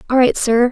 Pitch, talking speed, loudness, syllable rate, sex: 245 Hz, 250 wpm, -15 LUFS, 5.9 syllables/s, female